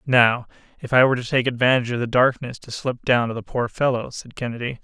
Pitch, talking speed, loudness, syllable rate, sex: 125 Hz, 235 wpm, -21 LUFS, 6.4 syllables/s, male